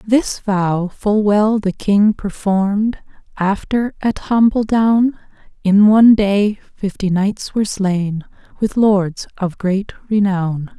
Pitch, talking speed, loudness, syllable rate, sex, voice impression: 205 Hz, 120 wpm, -16 LUFS, 3.8 syllables/s, female, feminine, adult-like, slightly soft, slightly calm, slightly elegant, slightly kind